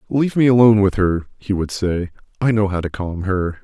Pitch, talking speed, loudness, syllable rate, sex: 100 Hz, 230 wpm, -18 LUFS, 5.7 syllables/s, male